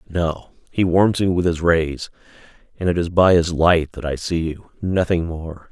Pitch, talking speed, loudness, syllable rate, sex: 85 Hz, 190 wpm, -19 LUFS, 4.4 syllables/s, male